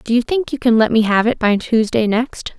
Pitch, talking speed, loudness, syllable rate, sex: 230 Hz, 280 wpm, -16 LUFS, 5.1 syllables/s, female